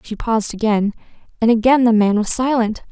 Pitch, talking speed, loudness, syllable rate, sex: 225 Hz, 185 wpm, -16 LUFS, 5.7 syllables/s, female